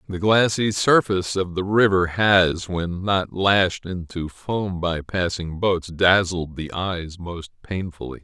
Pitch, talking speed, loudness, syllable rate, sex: 90 Hz, 145 wpm, -21 LUFS, 3.7 syllables/s, male